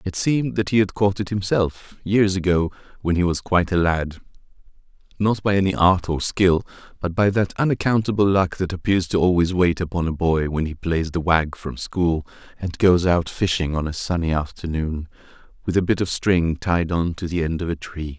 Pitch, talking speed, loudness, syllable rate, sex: 90 Hz, 210 wpm, -21 LUFS, 5.1 syllables/s, male